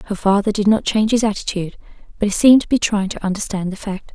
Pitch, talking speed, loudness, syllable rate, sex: 205 Hz, 245 wpm, -18 LUFS, 7.1 syllables/s, female